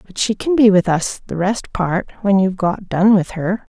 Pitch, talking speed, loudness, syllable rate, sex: 195 Hz, 240 wpm, -17 LUFS, 4.7 syllables/s, female